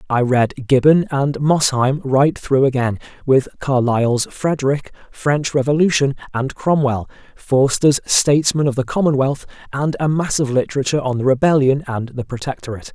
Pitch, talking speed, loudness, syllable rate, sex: 135 Hz, 145 wpm, -17 LUFS, 5.0 syllables/s, male